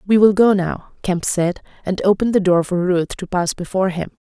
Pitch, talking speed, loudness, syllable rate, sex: 185 Hz, 225 wpm, -18 LUFS, 5.5 syllables/s, female